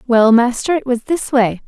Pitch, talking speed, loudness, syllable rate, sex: 245 Hz, 215 wpm, -15 LUFS, 4.7 syllables/s, female